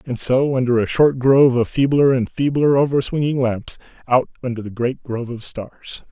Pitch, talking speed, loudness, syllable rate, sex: 130 Hz, 195 wpm, -18 LUFS, 5.1 syllables/s, male